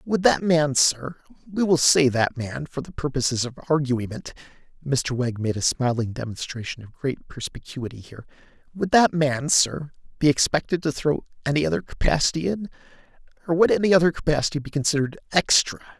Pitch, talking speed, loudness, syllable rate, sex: 140 Hz, 160 wpm, -23 LUFS, 5.6 syllables/s, male